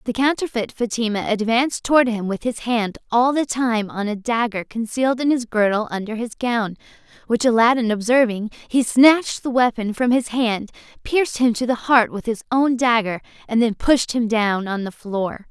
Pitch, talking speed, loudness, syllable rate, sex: 230 Hz, 190 wpm, -20 LUFS, 5.0 syllables/s, female